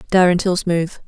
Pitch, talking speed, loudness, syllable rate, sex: 180 Hz, 165 wpm, -17 LUFS, 4.6 syllables/s, female